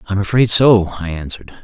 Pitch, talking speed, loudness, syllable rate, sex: 100 Hz, 185 wpm, -14 LUFS, 5.7 syllables/s, male